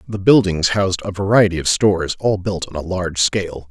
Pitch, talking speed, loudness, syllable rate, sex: 90 Hz, 210 wpm, -17 LUFS, 5.8 syllables/s, male